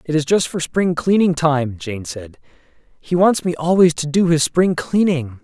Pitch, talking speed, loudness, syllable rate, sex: 160 Hz, 200 wpm, -17 LUFS, 4.4 syllables/s, male